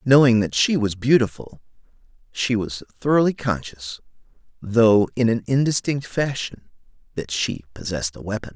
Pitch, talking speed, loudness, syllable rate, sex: 110 Hz, 135 wpm, -21 LUFS, 4.9 syllables/s, male